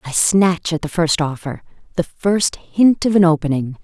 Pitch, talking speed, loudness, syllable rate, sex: 170 Hz, 190 wpm, -17 LUFS, 4.6 syllables/s, female